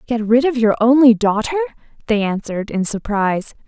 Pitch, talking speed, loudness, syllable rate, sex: 225 Hz, 165 wpm, -16 LUFS, 5.7 syllables/s, female